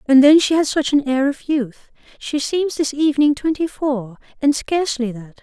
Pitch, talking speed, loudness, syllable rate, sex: 280 Hz, 200 wpm, -18 LUFS, 4.8 syllables/s, female